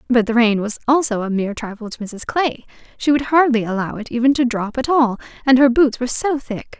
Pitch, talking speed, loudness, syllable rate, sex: 245 Hz, 240 wpm, -18 LUFS, 5.7 syllables/s, female